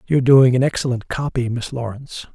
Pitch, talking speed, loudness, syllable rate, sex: 125 Hz, 180 wpm, -18 LUFS, 6.1 syllables/s, male